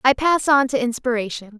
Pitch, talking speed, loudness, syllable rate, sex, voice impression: 250 Hz, 190 wpm, -19 LUFS, 5.4 syllables/s, female, very feminine, slightly young, bright, slightly cute, refreshing, lively